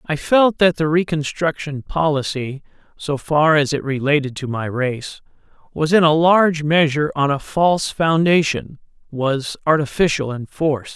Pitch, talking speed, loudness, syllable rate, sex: 150 Hz, 150 wpm, -18 LUFS, 4.6 syllables/s, male